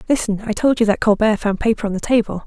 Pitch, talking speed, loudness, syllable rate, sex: 215 Hz, 270 wpm, -18 LUFS, 6.8 syllables/s, female